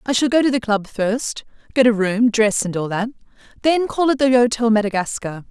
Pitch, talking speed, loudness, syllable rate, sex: 230 Hz, 220 wpm, -18 LUFS, 5.3 syllables/s, female